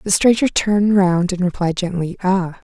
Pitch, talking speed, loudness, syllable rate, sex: 185 Hz, 175 wpm, -17 LUFS, 4.9 syllables/s, female